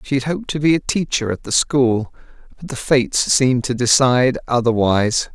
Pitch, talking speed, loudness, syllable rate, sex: 130 Hz, 190 wpm, -17 LUFS, 5.6 syllables/s, male